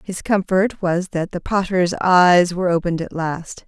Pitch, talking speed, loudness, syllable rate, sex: 180 Hz, 180 wpm, -18 LUFS, 4.6 syllables/s, female